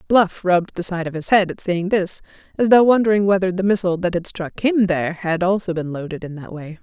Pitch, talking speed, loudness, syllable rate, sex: 185 Hz, 245 wpm, -19 LUFS, 5.9 syllables/s, female